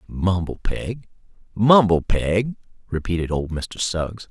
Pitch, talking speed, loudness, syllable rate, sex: 95 Hz, 110 wpm, -22 LUFS, 3.6 syllables/s, male